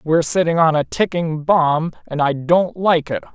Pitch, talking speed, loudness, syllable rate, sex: 160 Hz, 195 wpm, -17 LUFS, 4.6 syllables/s, male